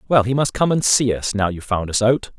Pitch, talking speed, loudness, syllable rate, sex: 115 Hz, 300 wpm, -18 LUFS, 6.0 syllables/s, male